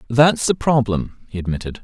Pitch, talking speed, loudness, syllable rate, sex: 120 Hz, 165 wpm, -19 LUFS, 5.2 syllables/s, male